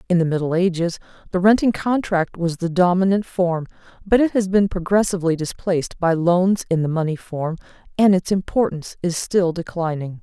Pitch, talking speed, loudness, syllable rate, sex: 180 Hz, 170 wpm, -20 LUFS, 5.3 syllables/s, female